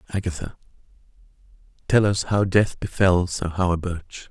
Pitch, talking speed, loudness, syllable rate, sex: 95 Hz, 110 wpm, -22 LUFS, 4.8 syllables/s, male